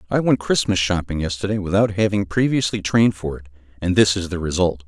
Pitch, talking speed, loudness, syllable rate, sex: 95 Hz, 195 wpm, -20 LUFS, 6.0 syllables/s, male